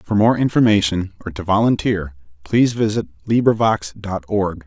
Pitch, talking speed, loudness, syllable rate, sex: 100 Hz, 140 wpm, -18 LUFS, 5.1 syllables/s, male